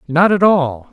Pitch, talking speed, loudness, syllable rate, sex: 160 Hz, 195 wpm, -13 LUFS, 4.1 syllables/s, male